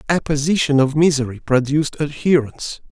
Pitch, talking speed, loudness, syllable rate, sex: 145 Hz, 105 wpm, -18 LUFS, 5.7 syllables/s, male